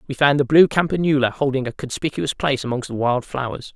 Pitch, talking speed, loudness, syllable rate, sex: 135 Hz, 210 wpm, -20 LUFS, 6.1 syllables/s, male